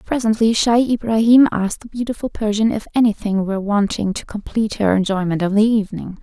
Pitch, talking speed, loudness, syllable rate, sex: 215 Hz, 175 wpm, -18 LUFS, 6.0 syllables/s, female